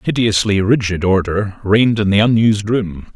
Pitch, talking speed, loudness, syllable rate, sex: 105 Hz, 150 wpm, -15 LUFS, 5.0 syllables/s, male